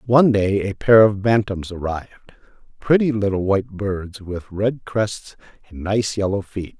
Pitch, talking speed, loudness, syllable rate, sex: 105 Hz, 150 wpm, -20 LUFS, 4.7 syllables/s, male